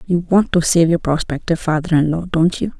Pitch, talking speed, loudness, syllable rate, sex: 165 Hz, 235 wpm, -17 LUFS, 5.7 syllables/s, female